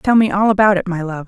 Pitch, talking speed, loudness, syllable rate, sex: 190 Hz, 330 wpm, -15 LUFS, 6.3 syllables/s, female